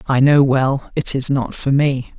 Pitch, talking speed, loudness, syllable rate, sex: 135 Hz, 220 wpm, -16 LUFS, 4.0 syllables/s, male